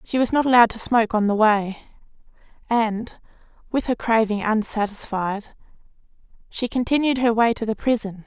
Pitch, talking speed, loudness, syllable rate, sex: 225 Hz, 150 wpm, -21 LUFS, 5.3 syllables/s, female